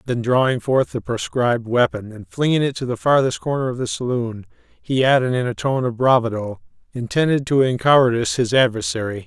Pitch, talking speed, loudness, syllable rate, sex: 125 Hz, 180 wpm, -19 LUFS, 5.6 syllables/s, male